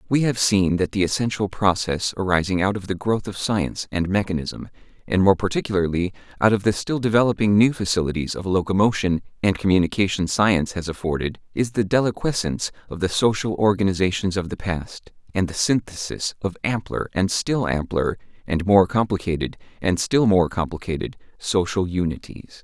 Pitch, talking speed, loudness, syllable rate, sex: 95 Hz, 160 wpm, -22 LUFS, 5.5 syllables/s, male